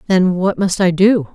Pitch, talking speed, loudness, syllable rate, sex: 185 Hz, 220 wpm, -14 LUFS, 4.4 syllables/s, female